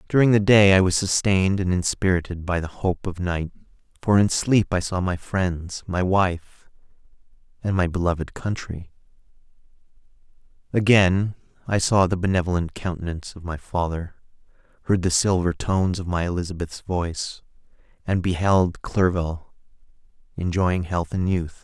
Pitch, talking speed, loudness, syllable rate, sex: 90 Hz, 140 wpm, -22 LUFS, 4.8 syllables/s, male